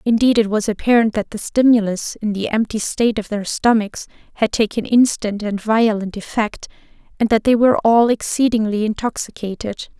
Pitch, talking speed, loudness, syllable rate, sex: 220 Hz, 160 wpm, -18 LUFS, 5.3 syllables/s, female